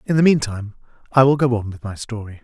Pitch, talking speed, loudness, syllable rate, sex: 120 Hz, 245 wpm, -19 LUFS, 6.6 syllables/s, male